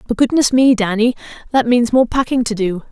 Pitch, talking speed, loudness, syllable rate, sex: 235 Hz, 205 wpm, -15 LUFS, 5.6 syllables/s, female